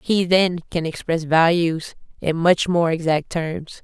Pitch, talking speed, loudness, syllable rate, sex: 170 Hz, 155 wpm, -20 LUFS, 3.9 syllables/s, female